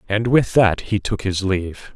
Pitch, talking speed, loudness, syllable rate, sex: 100 Hz, 215 wpm, -19 LUFS, 4.4 syllables/s, male